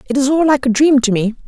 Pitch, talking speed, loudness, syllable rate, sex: 260 Hz, 325 wpm, -14 LUFS, 6.3 syllables/s, female